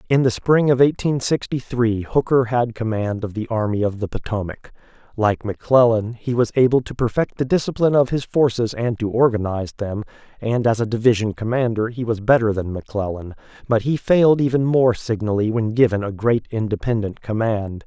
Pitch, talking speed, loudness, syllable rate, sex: 115 Hz, 180 wpm, -20 LUFS, 5.5 syllables/s, male